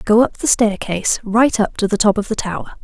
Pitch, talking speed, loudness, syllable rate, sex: 215 Hz, 255 wpm, -17 LUFS, 5.6 syllables/s, female